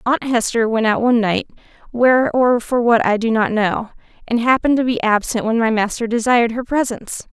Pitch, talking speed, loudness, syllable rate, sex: 235 Hz, 185 wpm, -17 LUFS, 5.7 syllables/s, female